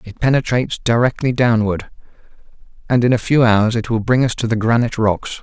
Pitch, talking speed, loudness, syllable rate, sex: 115 Hz, 190 wpm, -16 LUFS, 5.8 syllables/s, male